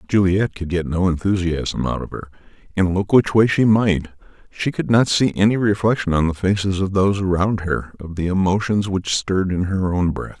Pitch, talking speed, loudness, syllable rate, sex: 95 Hz, 210 wpm, -19 LUFS, 5.2 syllables/s, male